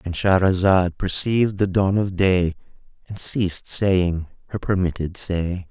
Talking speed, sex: 135 wpm, male